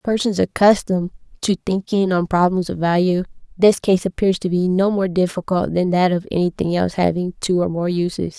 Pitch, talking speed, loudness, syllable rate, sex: 185 Hz, 195 wpm, -19 LUFS, 5.5 syllables/s, female